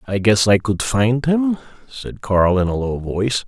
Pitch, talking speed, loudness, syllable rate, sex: 110 Hz, 205 wpm, -18 LUFS, 4.3 syllables/s, male